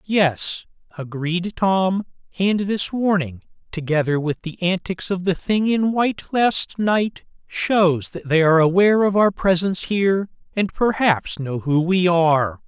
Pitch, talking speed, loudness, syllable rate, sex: 180 Hz, 150 wpm, -20 LUFS, 4.2 syllables/s, male